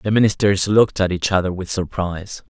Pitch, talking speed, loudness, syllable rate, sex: 95 Hz, 190 wpm, -18 LUFS, 5.8 syllables/s, male